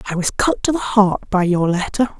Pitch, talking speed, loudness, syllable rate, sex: 205 Hz, 245 wpm, -18 LUFS, 5.7 syllables/s, female